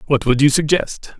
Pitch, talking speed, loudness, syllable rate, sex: 140 Hz, 200 wpm, -16 LUFS, 4.9 syllables/s, male